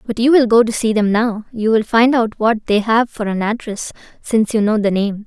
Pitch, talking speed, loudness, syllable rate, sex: 220 Hz, 240 wpm, -16 LUFS, 5.3 syllables/s, female